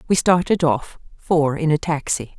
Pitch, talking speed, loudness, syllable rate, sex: 155 Hz, 150 wpm, -19 LUFS, 4.4 syllables/s, female